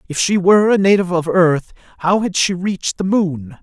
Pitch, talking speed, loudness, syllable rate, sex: 180 Hz, 215 wpm, -16 LUFS, 5.4 syllables/s, male